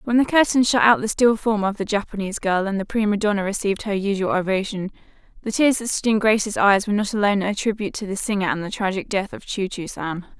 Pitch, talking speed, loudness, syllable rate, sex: 205 Hz, 250 wpm, -21 LUFS, 6.4 syllables/s, female